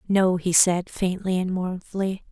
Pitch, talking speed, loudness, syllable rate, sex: 185 Hz, 155 wpm, -23 LUFS, 4.3 syllables/s, female